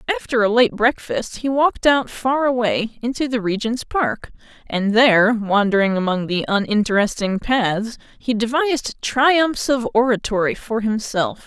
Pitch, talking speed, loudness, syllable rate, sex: 230 Hz, 140 wpm, -19 LUFS, 4.4 syllables/s, female